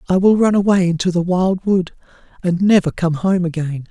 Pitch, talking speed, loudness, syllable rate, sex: 180 Hz, 200 wpm, -16 LUFS, 5.2 syllables/s, male